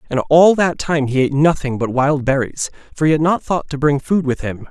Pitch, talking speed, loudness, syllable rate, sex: 145 Hz, 255 wpm, -16 LUFS, 5.5 syllables/s, male